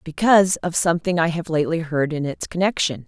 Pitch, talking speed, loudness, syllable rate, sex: 165 Hz, 195 wpm, -20 LUFS, 6.1 syllables/s, female